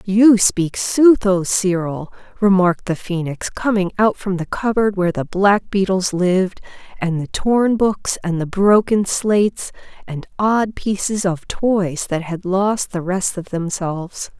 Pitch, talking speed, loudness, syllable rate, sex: 190 Hz, 155 wpm, -18 LUFS, 4.0 syllables/s, female